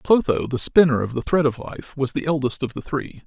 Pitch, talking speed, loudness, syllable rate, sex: 140 Hz, 255 wpm, -21 LUFS, 5.4 syllables/s, male